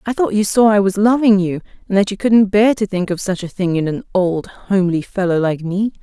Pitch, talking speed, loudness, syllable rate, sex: 195 Hz, 260 wpm, -16 LUFS, 5.4 syllables/s, female